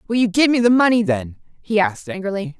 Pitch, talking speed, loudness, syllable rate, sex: 230 Hz, 230 wpm, -18 LUFS, 6.3 syllables/s, female